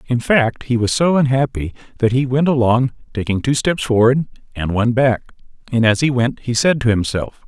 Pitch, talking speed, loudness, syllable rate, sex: 125 Hz, 200 wpm, -17 LUFS, 5.3 syllables/s, male